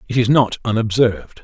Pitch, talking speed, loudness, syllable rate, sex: 115 Hz, 170 wpm, -17 LUFS, 5.9 syllables/s, male